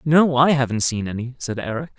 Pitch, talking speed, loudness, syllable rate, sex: 130 Hz, 210 wpm, -20 LUFS, 5.5 syllables/s, male